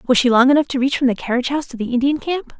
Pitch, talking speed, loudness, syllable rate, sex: 265 Hz, 325 wpm, -17 LUFS, 7.5 syllables/s, female